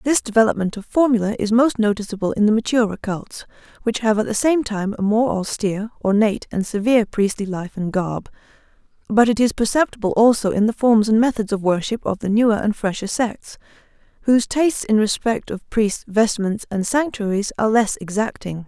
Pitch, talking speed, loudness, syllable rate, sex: 215 Hz, 185 wpm, -19 LUFS, 5.5 syllables/s, female